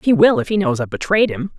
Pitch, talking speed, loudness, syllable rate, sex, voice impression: 195 Hz, 305 wpm, -17 LUFS, 6.9 syllables/s, female, very feminine, young, slightly adult-like, very thin, tensed, slightly powerful, very bright, slightly soft, very clear, fluent, very cute, slightly intellectual, refreshing, sincere, calm, friendly, reassuring, very unique, very elegant, very sweet, lively, kind